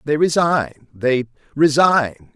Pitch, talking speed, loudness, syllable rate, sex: 145 Hz, 75 wpm, -17 LUFS, 3.4 syllables/s, male